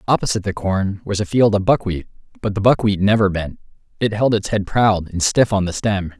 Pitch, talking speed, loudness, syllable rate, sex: 100 Hz, 225 wpm, -18 LUFS, 5.6 syllables/s, male